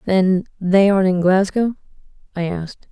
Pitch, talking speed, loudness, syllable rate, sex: 190 Hz, 125 wpm, -18 LUFS, 5.2 syllables/s, female